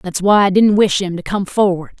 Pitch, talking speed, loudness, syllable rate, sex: 190 Hz, 270 wpm, -14 LUFS, 5.3 syllables/s, female